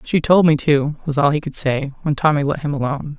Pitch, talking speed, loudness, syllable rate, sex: 145 Hz, 265 wpm, -18 LUFS, 5.9 syllables/s, female